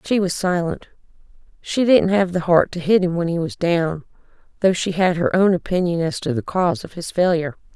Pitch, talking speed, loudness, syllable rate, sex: 175 Hz, 215 wpm, -19 LUFS, 5.5 syllables/s, female